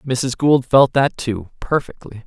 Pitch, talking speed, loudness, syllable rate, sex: 130 Hz, 160 wpm, -17 LUFS, 3.8 syllables/s, male